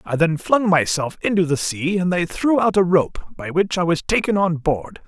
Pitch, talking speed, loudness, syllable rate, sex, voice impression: 175 Hz, 235 wpm, -19 LUFS, 4.8 syllables/s, male, very masculine, middle-aged, slightly thick, slightly powerful, cool, wild, slightly intense